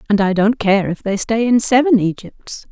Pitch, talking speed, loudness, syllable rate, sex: 215 Hz, 220 wpm, -15 LUFS, 4.8 syllables/s, female